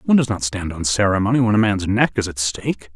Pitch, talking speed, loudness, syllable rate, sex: 100 Hz, 265 wpm, -19 LUFS, 6.3 syllables/s, male